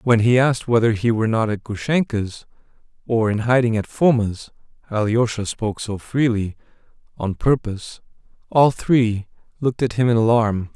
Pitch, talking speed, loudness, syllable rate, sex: 115 Hz, 150 wpm, -20 LUFS, 5.5 syllables/s, male